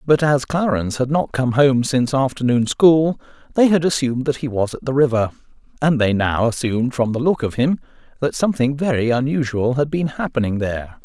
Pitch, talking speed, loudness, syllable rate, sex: 130 Hz, 195 wpm, -18 LUFS, 5.6 syllables/s, male